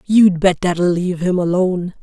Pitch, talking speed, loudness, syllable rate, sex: 180 Hz, 150 wpm, -16 LUFS, 4.9 syllables/s, female